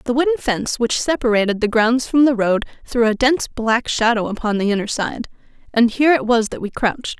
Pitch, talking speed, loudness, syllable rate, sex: 235 Hz, 215 wpm, -18 LUFS, 5.9 syllables/s, female